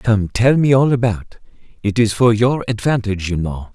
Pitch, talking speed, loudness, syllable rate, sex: 110 Hz, 175 wpm, -16 LUFS, 4.9 syllables/s, male